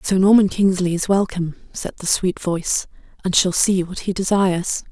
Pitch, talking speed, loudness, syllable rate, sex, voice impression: 185 Hz, 185 wpm, -19 LUFS, 5.3 syllables/s, female, very feminine, very adult-like, very middle-aged, very thin, relaxed, slightly weak, dark, hard, muffled, very fluent, slightly raspy, cute, very intellectual, slightly refreshing, slightly sincere, slightly calm, slightly friendly, reassuring, very unique, very elegant, wild, slightly sweet, slightly lively, slightly strict, slightly sharp, very modest, slightly light